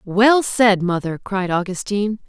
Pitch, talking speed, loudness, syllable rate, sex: 200 Hz, 130 wpm, -18 LUFS, 4.3 syllables/s, female